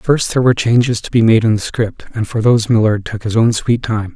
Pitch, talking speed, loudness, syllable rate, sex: 115 Hz, 275 wpm, -14 LUFS, 5.9 syllables/s, male